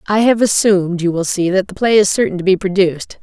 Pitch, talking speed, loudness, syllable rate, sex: 195 Hz, 260 wpm, -14 LUFS, 6.2 syllables/s, female